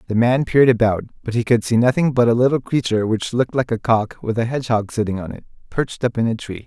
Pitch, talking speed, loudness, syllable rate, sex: 115 Hz, 260 wpm, -19 LUFS, 6.7 syllables/s, male